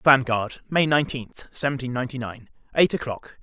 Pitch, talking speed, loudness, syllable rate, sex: 130 Hz, 140 wpm, -24 LUFS, 5.5 syllables/s, male